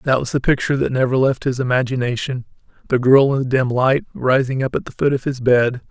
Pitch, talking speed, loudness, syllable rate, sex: 130 Hz, 225 wpm, -18 LUFS, 6.0 syllables/s, male